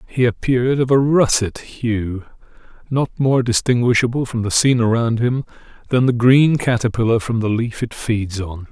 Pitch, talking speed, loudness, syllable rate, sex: 120 Hz, 165 wpm, -17 LUFS, 4.9 syllables/s, male